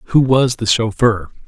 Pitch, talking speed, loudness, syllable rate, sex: 115 Hz, 165 wpm, -15 LUFS, 3.8 syllables/s, male